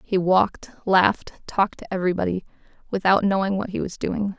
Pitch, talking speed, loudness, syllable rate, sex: 195 Hz, 165 wpm, -22 LUFS, 6.0 syllables/s, female